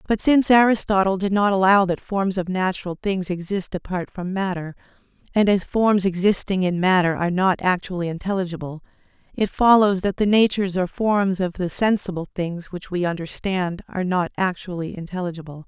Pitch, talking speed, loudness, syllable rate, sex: 185 Hz, 165 wpm, -21 LUFS, 5.4 syllables/s, female